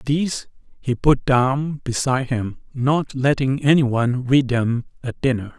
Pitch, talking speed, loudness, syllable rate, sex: 130 Hz, 130 wpm, -20 LUFS, 4.2 syllables/s, male